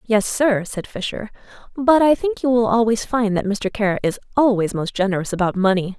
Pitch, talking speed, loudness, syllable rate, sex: 220 Hz, 200 wpm, -19 LUFS, 5.4 syllables/s, female